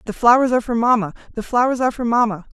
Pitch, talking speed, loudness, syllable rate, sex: 235 Hz, 230 wpm, -18 LUFS, 7.6 syllables/s, female